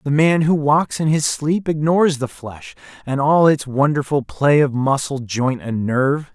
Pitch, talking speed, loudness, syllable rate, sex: 140 Hz, 190 wpm, -18 LUFS, 4.4 syllables/s, male